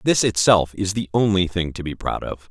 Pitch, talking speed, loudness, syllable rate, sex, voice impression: 100 Hz, 240 wpm, -20 LUFS, 5.1 syllables/s, male, masculine, adult-like, slightly refreshing, sincere, slightly friendly, slightly elegant